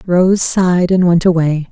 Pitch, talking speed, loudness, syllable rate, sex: 175 Hz, 175 wpm, -12 LUFS, 4.5 syllables/s, female